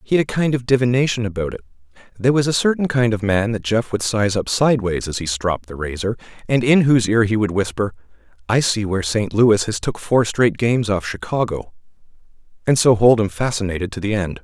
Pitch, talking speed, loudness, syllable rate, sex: 110 Hz, 215 wpm, -19 LUFS, 6.0 syllables/s, male